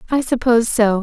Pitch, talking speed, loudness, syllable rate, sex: 235 Hz, 175 wpm, -16 LUFS, 6.2 syllables/s, female